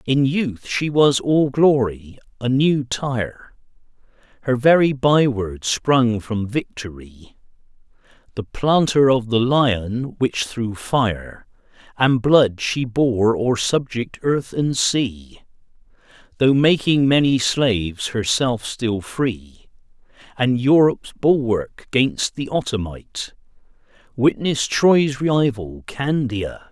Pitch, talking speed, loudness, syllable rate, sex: 125 Hz, 110 wpm, -19 LUFS, 3.3 syllables/s, male